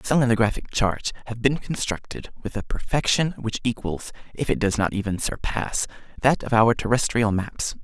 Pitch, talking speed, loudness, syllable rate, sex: 115 Hz, 160 wpm, -24 LUFS, 5.1 syllables/s, male